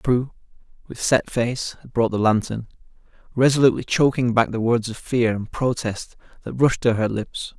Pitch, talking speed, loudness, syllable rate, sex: 120 Hz, 175 wpm, -21 LUFS, 4.8 syllables/s, male